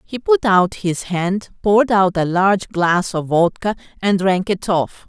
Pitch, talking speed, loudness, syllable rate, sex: 195 Hz, 190 wpm, -17 LUFS, 4.2 syllables/s, female